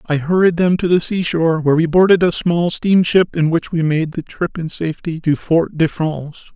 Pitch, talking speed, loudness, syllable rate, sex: 165 Hz, 220 wpm, -16 LUFS, 5.3 syllables/s, male